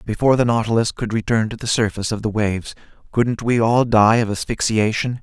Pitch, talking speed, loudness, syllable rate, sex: 110 Hz, 195 wpm, -19 LUFS, 5.9 syllables/s, male